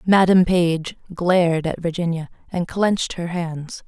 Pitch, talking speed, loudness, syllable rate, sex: 175 Hz, 140 wpm, -20 LUFS, 4.1 syllables/s, female